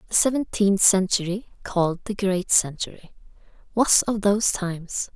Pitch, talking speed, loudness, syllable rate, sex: 195 Hz, 130 wpm, -22 LUFS, 4.8 syllables/s, female